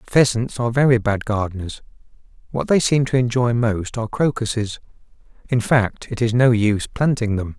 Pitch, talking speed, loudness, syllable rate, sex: 115 Hz, 160 wpm, -19 LUFS, 5.3 syllables/s, male